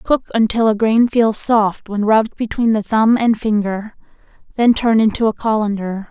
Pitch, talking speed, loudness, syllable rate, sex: 220 Hz, 175 wpm, -16 LUFS, 4.7 syllables/s, female